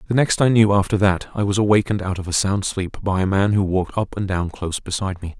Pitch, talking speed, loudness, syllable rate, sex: 100 Hz, 280 wpm, -20 LUFS, 6.4 syllables/s, male